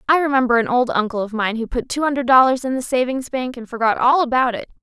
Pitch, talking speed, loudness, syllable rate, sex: 250 Hz, 260 wpm, -18 LUFS, 6.4 syllables/s, female